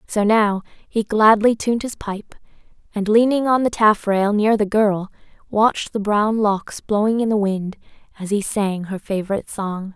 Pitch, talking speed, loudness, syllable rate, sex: 210 Hz, 175 wpm, -19 LUFS, 4.6 syllables/s, female